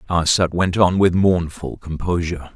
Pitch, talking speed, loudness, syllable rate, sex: 85 Hz, 140 wpm, -18 LUFS, 4.7 syllables/s, male